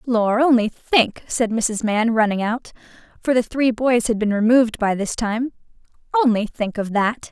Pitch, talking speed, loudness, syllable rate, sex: 230 Hz, 165 wpm, -19 LUFS, 4.6 syllables/s, female